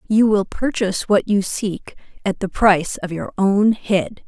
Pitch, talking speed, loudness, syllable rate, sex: 200 Hz, 185 wpm, -19 LUFS, 4.3 syllables/s, female